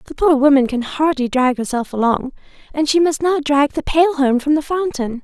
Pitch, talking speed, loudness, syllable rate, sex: 285 Hz, 220 wpm, -17 LUFS, 5.3 syllables/s, female